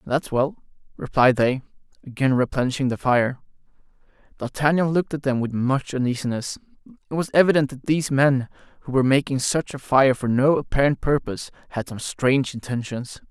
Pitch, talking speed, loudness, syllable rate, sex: 135 Hz, 160 wpm, -22 LUFS, 5.6 syllables/s, male